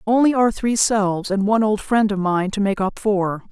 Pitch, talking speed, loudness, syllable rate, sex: 205 Hz, 240 wpm, -19 LUFS, 5.1 syllables/s, female